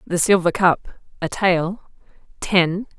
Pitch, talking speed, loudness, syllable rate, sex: 180 Hz, 120 wpm, -19 LUFS, 3.4 syllables/s, female